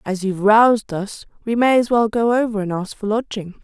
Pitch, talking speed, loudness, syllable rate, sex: 215 Hz, 230 wpm, -18 LUFS, 5.4 syllables/s, female